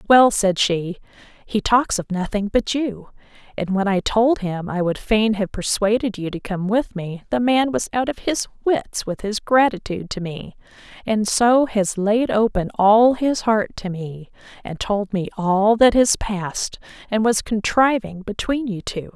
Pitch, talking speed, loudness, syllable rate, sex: 210 Hz, 185 wpm, -20 LUFS, 4.2 syllables/s, female